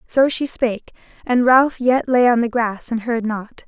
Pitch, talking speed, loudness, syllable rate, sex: 240 Hz, 210 wpm, -18 LUFS, 4.4 syllables/s, female